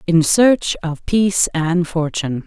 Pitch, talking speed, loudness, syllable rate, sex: 170 Hz, 145 wpm, -17 LUFS, 4.0 syllables/s, female